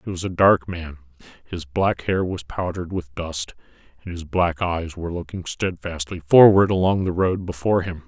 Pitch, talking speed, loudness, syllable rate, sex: 85 Hz, 185 wpm, -21 LUFS, 5.0 syllables/s, male